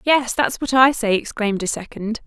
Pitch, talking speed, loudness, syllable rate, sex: 235 Hz, 210 wpm, -19 LUFS, 5.1 syllables/s, female